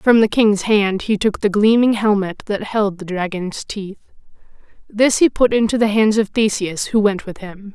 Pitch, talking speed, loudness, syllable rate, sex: 210 Hz, 200 wpm, -17 LUFS, 4.6 syllables/s, female